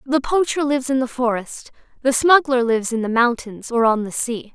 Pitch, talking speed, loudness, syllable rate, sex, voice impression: 250 Hz, 210 wpm, -19 LUFS, 5.3 syllables/s, female, feminine, slightly young, slightly tensed, slightly clear, slightly cute, refreshing, slightly sincere, friendly